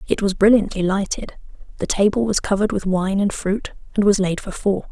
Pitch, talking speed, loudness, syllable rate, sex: 200 Hz, 205 wpm, -20 LUFS, 5.6 syllables/s, female